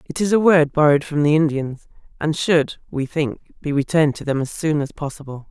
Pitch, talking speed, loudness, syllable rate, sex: 150 Hz, 220 wpm, -19 LUFS, 5.4 syllables/s, female